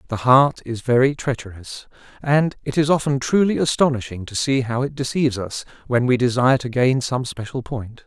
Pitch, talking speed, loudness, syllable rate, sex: 130 Hz, 185 wpm, -20 LUFS, 5.3 syllables/s, male